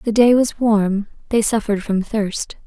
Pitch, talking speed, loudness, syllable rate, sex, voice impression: 215 Hz, 180 wpm, -18 LUFS, 4.5 syllables/s, female, very feminine, young, very thin, relaxed, weak, slightly bright, very soft, clear, very fluent, slightly raspy, very cute, intellectual, refreshing, very sincere, very calm, very friendly, very reassuring, very unique, very elegant, very sweet, very kind, modest, very light